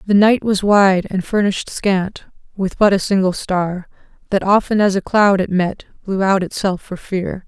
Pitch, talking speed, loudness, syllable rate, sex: 195 Hz, 195 wpm, -17 LUFS, 4.5 syllables/s, female